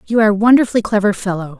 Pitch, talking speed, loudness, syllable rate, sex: 210 Hz, 225 wpm, -14 LUFS, 8.3 syllables/s, female